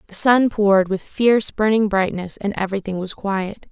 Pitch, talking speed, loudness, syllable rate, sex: 200 Hz, 180 wpm, -19 LUFS, 5.1 syllables/s, female